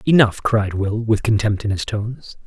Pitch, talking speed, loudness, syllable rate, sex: 110 Hz, 195 wpm, -19 LUFS, 4.8 syllables/s, male